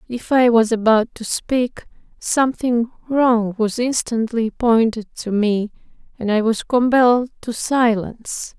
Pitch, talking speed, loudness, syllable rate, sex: 230 Hz, 135 wpm, -18 LUFS, 3.9 syllables/s, female